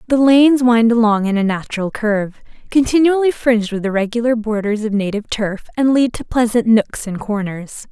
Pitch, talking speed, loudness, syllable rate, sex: 225 Hz, 175 wpm, -16 LUFS, 5.5 syllables/s, female